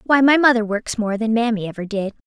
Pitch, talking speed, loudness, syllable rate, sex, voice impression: 225 Hz, 240 wpm, -18 LUFS, 5.8 syllables/s, female, feminine, adult-like, slightly tensed, slightly powerful, soft, slightly raspy, cute, friendly, reassuring, elegant, lively